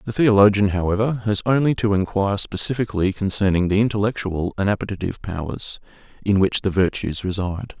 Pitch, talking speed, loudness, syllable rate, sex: 100 Hz, 145 wpm, -20 LUFS, 6.1 syllables/s, male